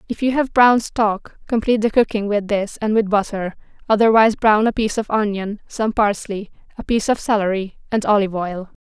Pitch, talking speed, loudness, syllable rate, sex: 210 Hz, 190 wpm, -18 LUFS, 5.6 syllables/s, female